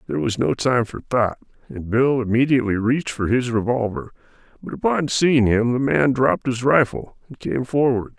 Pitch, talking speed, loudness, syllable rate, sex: 120 Hz, 185 wpm, -20 LUFS, 5.3 syllables/s, male